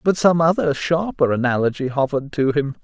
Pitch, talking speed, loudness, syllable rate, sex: 150 Hz, 170 wpm, -19 LUFS, 5.6 syllables/s, male